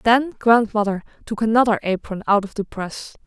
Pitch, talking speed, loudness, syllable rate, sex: 215 Hz, 165 wpm, -20 LUFS, 5.1 syllables/s, female